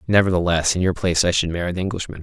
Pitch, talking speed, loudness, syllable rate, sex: 90 Hz, 240 wpm, -20 LUFS, 7.7 syllables/s, male